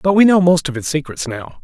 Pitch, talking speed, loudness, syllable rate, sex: 155 Hz, 295 wpm, -16 LUFS, 5.7 syllables/s, male